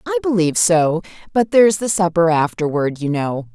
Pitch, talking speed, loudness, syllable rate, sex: 185 Hz, 185 wpm, -17 LUFS, 5.7 syllables/s, female